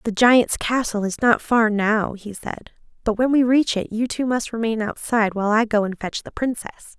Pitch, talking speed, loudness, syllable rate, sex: 225 Hz, 225 wpm, -20 LUFS, 5.3 syllables/s, female